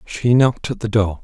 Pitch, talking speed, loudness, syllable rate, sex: 110 Hz, 245 wpm, -17 LUFS, 5.4 syllables/s, male